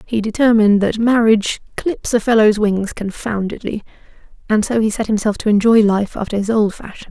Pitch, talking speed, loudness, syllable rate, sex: 215 Hz, 175 wpm, -16 LUFS, 5.5 syllables/s, female